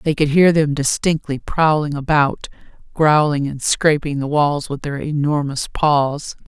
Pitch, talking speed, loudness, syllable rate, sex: 145 Hz, 150 wpm, -17 LUFS, 4.1 syllables/s, female